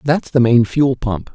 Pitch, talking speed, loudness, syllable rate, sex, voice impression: 125 Hz, 225 wpm, -15 LUFS, 4.1 syllables/s, male, masculine, middle-aged, thick, tensed, slightly hard, clear, fluent, intellectual, sincere, calm, mature, slightly friendly, slightly reassuring, slightly wild, slightly lively, slightly strict